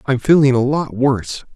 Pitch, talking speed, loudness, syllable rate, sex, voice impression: 130 Hz, 195 wpm, -15 LUFS, 5.1 syllables/s, male, very masculine, adult-like, slightly middle-aged, slightly thick, slightly tensed, slightly weak, slightly dark, soft, muffled, very fluent, slightly raspy, very cool, very intellectual, very sincere, very calm, very mature, friendly, reassuring, unique, slightly elegant, very wild, sweet, lively, very kind